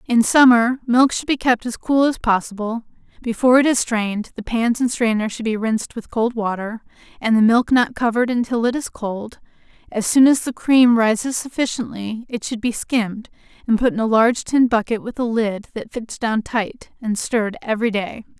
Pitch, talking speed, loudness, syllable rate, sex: 230 Hz, 200 wpm, -19 LUFS, 5.2 syllables/s, female